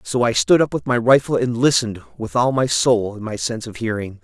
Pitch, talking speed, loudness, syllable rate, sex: 115 Hz, 255 wpm, -18 LUFS, 5.8 syllables/s, male